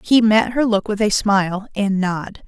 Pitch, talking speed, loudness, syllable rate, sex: 210 Hz, 220 wpm, -18 LUFS, 4.3 syllables/s, female